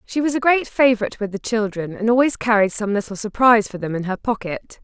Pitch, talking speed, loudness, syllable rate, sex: 220 Hz, 235 wpm, -19 LUFS, 6.2 syllables/s, female